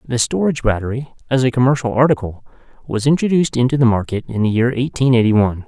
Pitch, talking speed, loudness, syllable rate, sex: 125 Hz, 190 wpm, -17 LUFS, 6.8 syllables/s, male